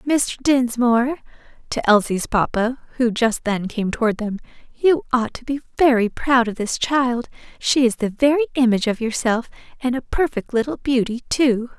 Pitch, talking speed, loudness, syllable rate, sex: 245 Hz, 160 wpm, -20 LUFS, 4.8 syllables/s, female